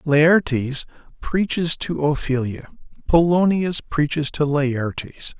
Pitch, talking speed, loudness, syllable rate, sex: 150 Hz, 90 wpm, -20 LUFS, 3.9 syllables/s, male